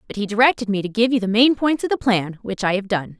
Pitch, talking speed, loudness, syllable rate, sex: 220 Hz, 320 wpm, -19 LUFS, 6.4 syllables/s, female